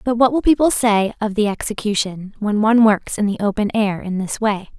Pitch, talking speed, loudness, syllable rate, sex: 215 Hz, 225 wpm, -18 LUFS, 5.5 syllables/s, female